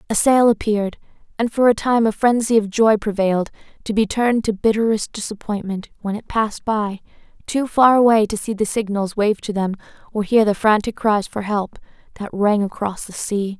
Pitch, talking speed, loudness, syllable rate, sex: 215 Hz, 195 wpm, -19 LUFS, 5.4 syllables/s, female